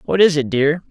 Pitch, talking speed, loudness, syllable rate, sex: 155 Hz, 265 wpm, -16 LUFS, 5.3 syllables/s, male